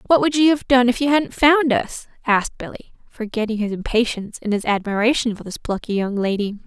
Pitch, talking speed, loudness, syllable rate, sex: 230 Hz, 205 wpm, -19 LUFS, 5.8 syllables/s, female